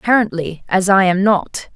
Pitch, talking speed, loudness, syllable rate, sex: 190 Hz, 135 wpm, -15 LUFS, 4.8 syllables/s, female